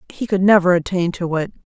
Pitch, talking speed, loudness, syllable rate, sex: 185 Hz, 215 wpm, -17 LUFS, 5.9 syllables/s, female